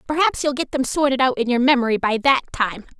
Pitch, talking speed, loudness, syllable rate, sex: 265 Hz, 240 wpm, -19 LUFS, 6.1 syllables/s, female